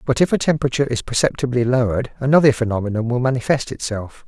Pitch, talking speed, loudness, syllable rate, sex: 125 Hz, 170 wpm, -19 LUFS, 7.0 syllables/s, male